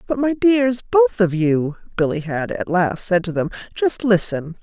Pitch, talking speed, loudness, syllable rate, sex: 200 Hz, 195 wpm, -19 LUFS, 4.4 syllables/s, female